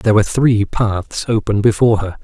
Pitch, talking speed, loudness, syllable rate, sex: 105 Hz, 190 wpm, -15 LUFS, 5.6 syllables/s, male